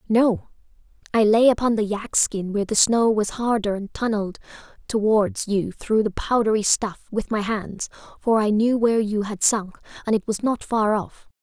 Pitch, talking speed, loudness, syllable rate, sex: 215 Hz, 190 wpm, -22 LUFS, 4.8 syllables/s, female